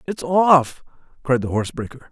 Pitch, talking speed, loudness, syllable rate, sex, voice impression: 145 Hz, 170 wpm, -18 LUFS, 5.3 syllables/s, male, masculine, adult-like, slightly relaxed, slightly weak, slightly bright, soft, cool, calm, friendly, reassuring, wild, kind